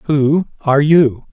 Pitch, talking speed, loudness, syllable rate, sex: 145 Hz, 135 wpm, -14 LUFS, 3.9 syllables/s, male